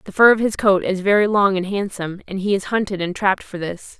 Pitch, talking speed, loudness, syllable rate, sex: 195 Hz, 270 wpm, -19 LUFS, 6.1 syllables/s, female